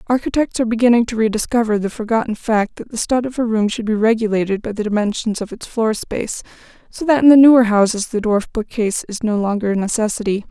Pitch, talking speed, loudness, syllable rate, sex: 220 Hz, 215 wpm, -17 LUFS, 6.4 syllables/s, female